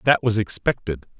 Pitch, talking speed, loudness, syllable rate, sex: 105 Hz, 150 wpm, -22 LUFS, 5.1 syllables/s, male